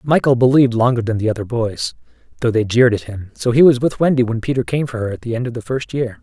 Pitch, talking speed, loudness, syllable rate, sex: 120 Hz, 280 wpm, -17 LUFS, 6.6 syllables/s, male